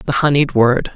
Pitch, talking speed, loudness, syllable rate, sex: 135 Hz, 190 wpm, -14 LUFS, 4.4 syllables/s, female